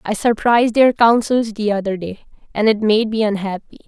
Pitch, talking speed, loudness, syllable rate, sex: 215 Hz, 185 wpm, -16 LUFS, 5.2 syllables/s, female